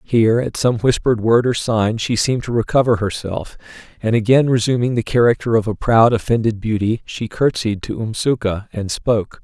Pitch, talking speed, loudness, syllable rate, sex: 115 Hz, 180 wpm, -17 LUFS, 5.3 syllables/s, male